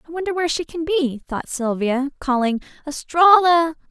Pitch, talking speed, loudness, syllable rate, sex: 300 Hz, 155 wpm, -19 LUFS, 5.1 syllables/s, female